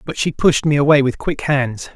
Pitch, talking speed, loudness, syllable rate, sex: 140 Hz, 245 wpm, -16 LUFS, 5.0 syllables/s, male